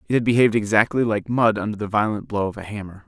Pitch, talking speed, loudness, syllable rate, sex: 105 Hz, 255 wpm, -21 LUFS, 6.7 syllables/s, male